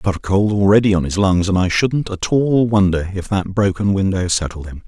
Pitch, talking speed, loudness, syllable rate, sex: 95 Hz, 245 wpm, -17 LUFS, 5.4 syllables/s, male